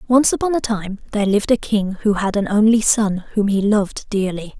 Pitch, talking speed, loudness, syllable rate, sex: 210 Hz, 220 wpm, -18 LUFS, 5.6 syllables/s, female